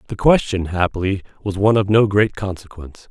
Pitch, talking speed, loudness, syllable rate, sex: 100 Hz, 175 wpm, -18 LUFS, 6.0 syllables/s, male